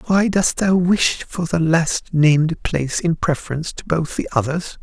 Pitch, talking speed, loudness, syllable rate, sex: 165 Hz, 185 wpm, -19 LUFS, 4.6 syllables/s, male